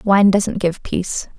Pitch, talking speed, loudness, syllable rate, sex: 195 Hz, 175 wpm, -18 LUFS, 4.1 syllables/s, female